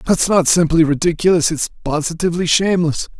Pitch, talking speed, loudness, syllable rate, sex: 165 Hz, 130 wpm, -16 LUFS, 6.1 syllables/s, male